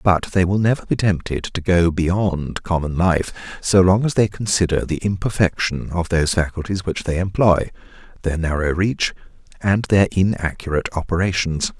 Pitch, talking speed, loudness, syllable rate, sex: 90 Hz, 160 wpm, -19 LUFS, 4.9 syllables/s, male